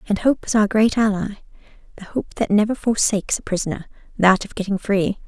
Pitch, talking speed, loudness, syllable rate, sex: 205 Hz, 170 wpm, -20 LUFS, 5.8 syllables/s, female